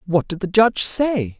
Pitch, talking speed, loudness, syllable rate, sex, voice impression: 195 Hz, 215 wpm, -19 LUFS, 4.8 syllables/s, female, feminine, middle-aged, powerful, muffled, halting, raspy, slightly friendly, slightly reassuring, strict, sharp